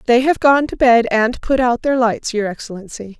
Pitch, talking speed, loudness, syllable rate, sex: 240 Hz, 225 wpm, -15 LUFS, 5.0 syllables/s, female